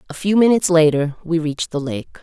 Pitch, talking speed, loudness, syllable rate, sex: 165 Hz, 215 wpm, -17 LUFS, 6.1 syllables/s, female